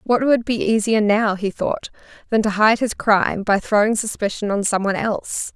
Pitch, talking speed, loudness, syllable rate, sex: 215 Hz, 205 wpm, -19 LUFS, 5.2 syllables/s, female